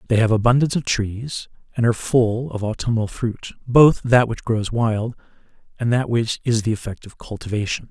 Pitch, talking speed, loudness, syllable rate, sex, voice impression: 115 Hz, 180 wpm, -20 LUFS, 5.2 syllables/s, male, masculine, adult-like, fluent, cool, intellectual, elegant, slightly sweet